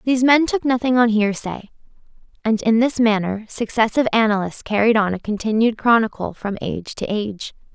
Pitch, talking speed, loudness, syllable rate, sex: 220 Hz, 165 wpm, -19 LUFS, 5.7 syllables/s, female